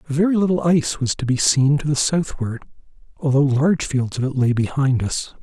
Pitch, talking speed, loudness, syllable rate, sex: 140 Hz, 200 wpm, -19 LUFS, 5.2 syllables/s, male